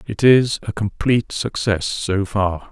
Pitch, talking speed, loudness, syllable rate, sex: 105 Hz, 155 wpm, -19 LUFS, 3.9 syllables/s, male